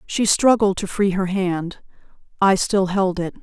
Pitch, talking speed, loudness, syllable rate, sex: 190 Hz, 175 wpm, -19 LUFS, 4.1 syllables/s, female